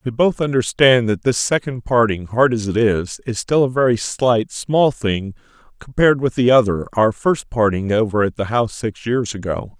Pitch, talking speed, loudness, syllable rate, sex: 120 Hz, 195 wpm, -18 LUFS, 4.8 syllables/s, male